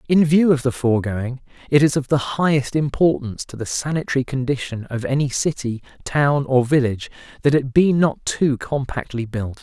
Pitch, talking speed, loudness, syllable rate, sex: 135 Hz, 175 wpm, -20 LUFS, 5.2 syllables/s, male